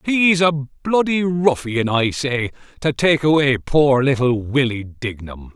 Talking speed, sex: 140 wpm, male